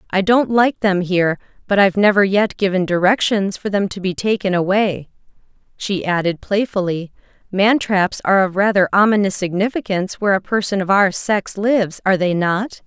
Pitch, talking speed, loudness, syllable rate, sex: 195 Hz, 175 wpm, -17 LUFS, 5.3 syllables/s, female